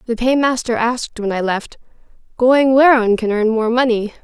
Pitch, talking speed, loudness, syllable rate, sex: 235 Hz, 185 wpm, -15 LUFS, 5.3 syllables/s, female